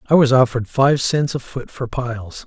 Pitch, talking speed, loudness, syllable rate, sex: 125 Hz, 220 wpm, -18 LUFS, 5.1 syllables/s, male